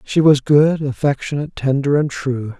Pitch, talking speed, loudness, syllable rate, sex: 140 Hz, 160 wpm, -17 LUFS, 4.8 syllables/s, male